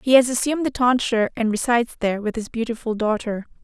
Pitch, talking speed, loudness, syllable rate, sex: 235 Hz, 200 wpm, -21 LUFS, 6.6 syllables/s, female